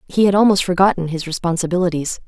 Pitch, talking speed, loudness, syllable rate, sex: 180 Hz, 160 wpm, -17 LUFS, 6.8 syllables/s, female